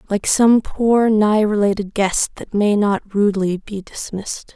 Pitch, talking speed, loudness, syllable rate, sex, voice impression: 205 Hz, 160 wpm, -17 LUFS, 4.0 syllables/s, female, very feminine, young, slightly thin, relaxed, weak, dark, very soft, slightly muffled, fluent, cute, intellectual, slightly refreshing, sincere, very calm, friendly, reassuring, unique, very elegant, slightly wild, sweet, slightly lively, very kind, slightly sharp, very modest